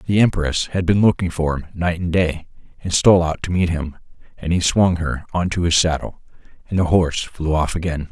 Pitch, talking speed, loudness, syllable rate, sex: 85 Hz, 220 wpm, -19 LUFS, 5.5 syllables/s, male